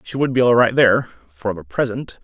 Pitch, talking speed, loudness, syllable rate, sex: 115 Hz, 215 wpm, -18 LUFS, 5.9 syllables/s, male